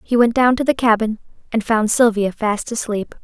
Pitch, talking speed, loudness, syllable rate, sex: 225 Hz, 205 wpm, -17 LUFS, 5.0 syllables/s, female